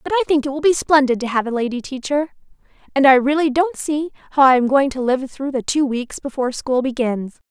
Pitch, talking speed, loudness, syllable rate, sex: 275 Hz, 230 wpm, -18 LUFS, 5.6 syllables/s, female